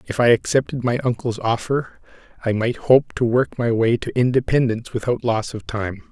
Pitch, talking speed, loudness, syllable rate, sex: 120 Hz, 185 wpm, -20 LUFS, 5.1 syllables/s, male